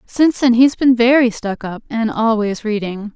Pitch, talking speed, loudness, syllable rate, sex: 230 Hz, 190 wpm, -16 LUFS, 4.7 syllables/s, female